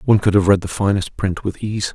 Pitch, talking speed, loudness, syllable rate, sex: 100 Hz, 280 wpm, -18 LUFS, 6.1 syllables/s, male